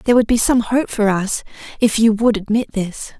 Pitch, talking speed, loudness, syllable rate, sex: 220 Hz, 225 wpm, -17 LUFS, 5.2 syllables/s, female